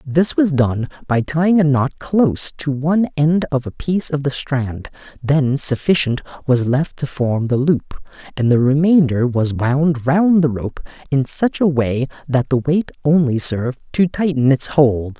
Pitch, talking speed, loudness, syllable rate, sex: 140 Hz, 180 wpm, -17 LUFS, 4.3 syllables/s, male